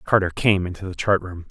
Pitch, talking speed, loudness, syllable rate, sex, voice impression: 95 Hz, 240 wpm, -21 LUFS, 6.0 syllables/s, male, masculine, adult-like, slightly thick, fluent, slightly refreshing, sincere, slightly friendly